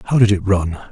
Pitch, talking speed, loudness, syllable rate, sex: 100 Hz, 260 wpm, -16 LUFS, 6.8 syllables/s, male